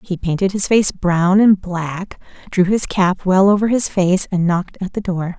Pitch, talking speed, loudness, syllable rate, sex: 185 Hz, 210 wpm, -16 LUFS, 4.5 syllables/s, female